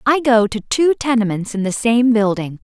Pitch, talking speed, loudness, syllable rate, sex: 230 Hz, 200 wpm, -16 LUFS, 4.9 syllables/s, female